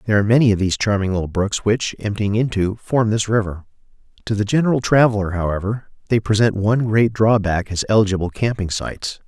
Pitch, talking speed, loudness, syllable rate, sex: 105 Hz, 180 wpm, -19 LUFS, 6.2 syllables/s, male